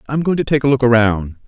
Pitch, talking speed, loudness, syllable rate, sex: 125 Hz, 285 wpm, -15 LUFS, 6.7 syllables/s, male